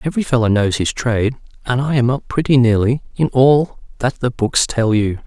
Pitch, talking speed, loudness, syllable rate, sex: 125 Hz, 195 wpm, -16 LUFS, 5.2 syllables/s, male